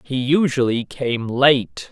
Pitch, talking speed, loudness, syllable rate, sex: 130 Hz, 125 wpm, -18 LUFS, 3.3 syllables/s, male